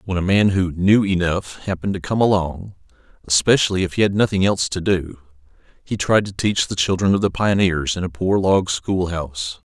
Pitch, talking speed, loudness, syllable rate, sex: 90 Hz, 200 wpm, -19 LUFS, 5.4 syllables/s, male